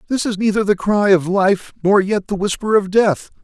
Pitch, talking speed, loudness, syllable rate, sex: 200 Hz, 225 wpm, -16 LUFS, 5.0 syllables/s, male